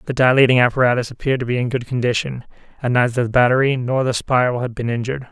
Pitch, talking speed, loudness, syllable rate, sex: 125 Hz, 215 wpm, -18 LUFS, 7.1 syllables/s, male